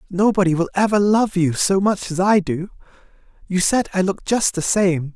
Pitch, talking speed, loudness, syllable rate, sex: 185 Hz, 185 wpm, -18 LUFS, 5.4 syllables/s, male